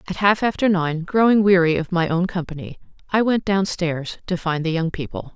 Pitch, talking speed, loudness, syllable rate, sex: 180 Hz, 200 wpm, -20 LUFS, 5.2 syllables/s, female